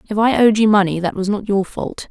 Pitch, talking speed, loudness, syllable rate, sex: 205 Hz, 285 wpm, -16 LUFS, 5.7 syllables/s, female